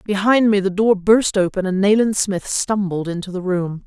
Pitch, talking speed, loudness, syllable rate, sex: 195 Hz, 200 wpm, -18 LUFS, 4.8 syllables/s, female